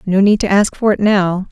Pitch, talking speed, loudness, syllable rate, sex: 200 Hz, 275 wpm, -14 LUFS, 5.0 syllables/s, female